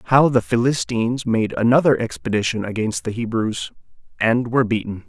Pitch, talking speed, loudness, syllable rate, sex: 115 Hz, 140 wpm, -20 LUFS, 5.5 syllables/s, male